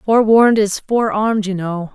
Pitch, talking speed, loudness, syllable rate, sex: 210 Hz, 155 wpm, -15 LUFS, 5.5 syllables/s, female